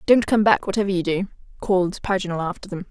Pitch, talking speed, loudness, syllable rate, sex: 190 Hz, 205 wpm, -21 LUFS, 6.5 syllables/s, female